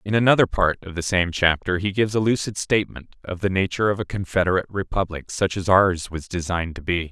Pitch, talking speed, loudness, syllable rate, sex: 95 Hz, 220 wpm, -22 LUFS, 6.2 syllables/s, male